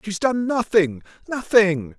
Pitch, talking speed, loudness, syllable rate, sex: 200 Hz, 120 wpm, -20 LUFS, 3.7 syllables/s, male